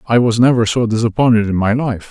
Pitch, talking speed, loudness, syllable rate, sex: 115 Hz, 230 wpm, -14 LUFS, 6.0 syllables/s, male